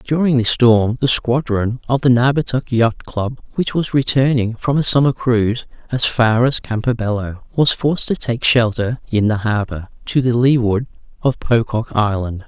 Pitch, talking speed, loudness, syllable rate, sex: 120 Hz, 170 wpm, -17 LUFS, 4.7 syllables/s, male